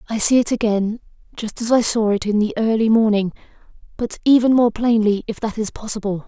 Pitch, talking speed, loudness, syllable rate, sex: 220 Hz, 180 wpm, -18 LUFS, 5.7 syllables/s, female